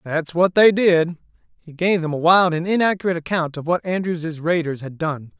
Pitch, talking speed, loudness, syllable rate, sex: 170 Hz, 200 wpm, -19 LUFS, 5.1 syllables/s, male